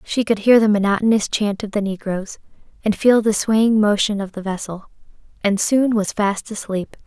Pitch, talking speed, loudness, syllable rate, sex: 210 Hz, 185 wpm, -18 LUFS, 4.9 syllables/s, female